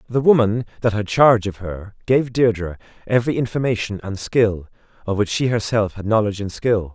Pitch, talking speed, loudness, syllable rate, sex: 110 Hz, 180 wpm, -19 LUFS, 5.6 syllables/s, male